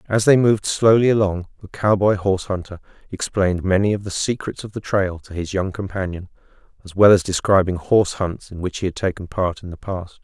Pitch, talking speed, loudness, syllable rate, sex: 95 Hz, 210 wpm, -20 LUFS, 5.8 syllables/s, male